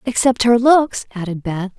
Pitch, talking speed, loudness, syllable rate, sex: 225 Hz, 170 wpm, -16 LUFS, 4.6 syllables/s, female